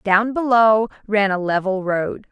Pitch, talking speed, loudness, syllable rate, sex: 205 Hz, 155 wpm, -18 LUFS, 4.0 syllables/s, female